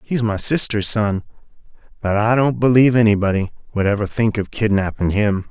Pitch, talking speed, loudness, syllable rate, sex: 110 Hz, 165 wpm, -18 LUFS, 5.2 syllables/s, male